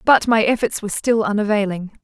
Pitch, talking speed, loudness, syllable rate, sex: 215 Hz, 175 wpm, -18 LUFS, 5.7 syllables/s, female